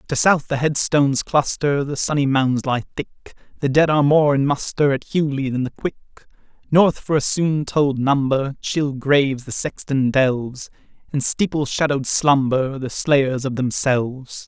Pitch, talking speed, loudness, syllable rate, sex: 140 Hz, 165 wpm, -19 LUFS, 4.6 syllables/s, male